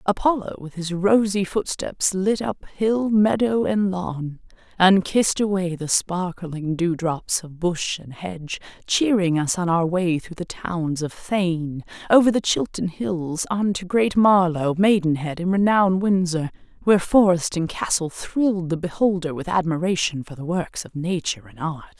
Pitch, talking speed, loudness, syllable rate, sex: 180 Hz, 160 wpm, -22 LUFS, 4.4 syllables/s, female